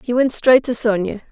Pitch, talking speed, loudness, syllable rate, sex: 235 Hz, 230 wpm, -16 LUFS, 5.3 syllables/s, female